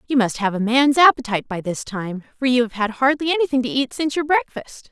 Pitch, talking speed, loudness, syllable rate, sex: 250 Hz, 245 wpm, -19 LUFS, 6.1 syllables/s, female